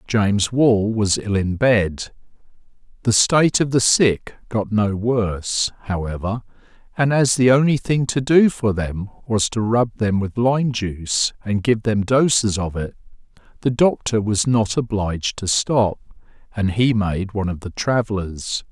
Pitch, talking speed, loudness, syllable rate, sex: 110 Hz, 165 wpm, -19 LUFS, 4.2 syllables/s, male